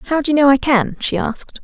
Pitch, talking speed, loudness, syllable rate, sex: 270 Hz, 295 wpm, -16 LUFS, 5.8 syllables/s, female